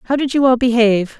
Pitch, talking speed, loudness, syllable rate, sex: 245 Hz, 250 wpm, -14 LUFS, 6.9 syllables/s, female